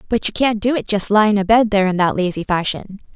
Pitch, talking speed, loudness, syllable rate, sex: 205 Hz, 245 wpm, -17 LUFS, 5.9 syllables/s, female